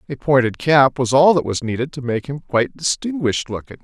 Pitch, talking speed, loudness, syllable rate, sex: 135 Hz, 220 wpm, -18 LUFS, 5.8 syllables/s, male